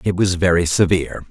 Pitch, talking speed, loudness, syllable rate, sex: 90 Hz, 185 wpm, -17 LUFS, 5.9 syllables/s, male